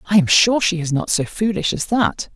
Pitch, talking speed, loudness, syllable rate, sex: 195 Hz, 255 wpm, -17 LUFS, 5.2 syllables/s, female